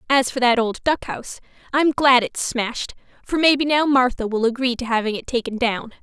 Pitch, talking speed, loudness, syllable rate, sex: 250 Hz, 200 wpm, -20 LUFS, 5.5 syllables/s, female